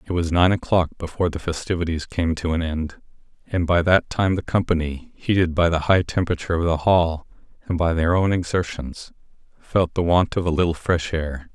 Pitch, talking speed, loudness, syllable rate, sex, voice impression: 85 Hz, 200 wpm, -21 LUFS, 5.4 syllables/s, male, masculine, adult-like, slightly thick, cool, intellectual, calm, slightly elegant